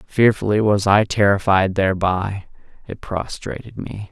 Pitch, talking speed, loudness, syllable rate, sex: 100 Hz, 115 wpm, -19 LUFS, 4.4 syllables/s, male